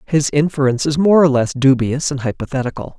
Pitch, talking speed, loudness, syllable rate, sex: 140 Hz, 180 wpm, -16 LUFS, 6.1 syllables/s, male